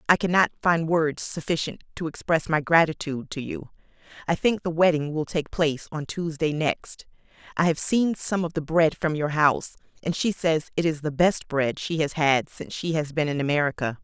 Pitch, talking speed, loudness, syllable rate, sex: 160 Hz, 205 wpm, -24 LUFS, 5.2 syllables/s, female